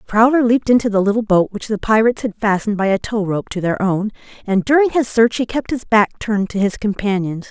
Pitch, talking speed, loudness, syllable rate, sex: 215 Hz, 240 wpm, -17 LUFS, 6.0 syllables/s, female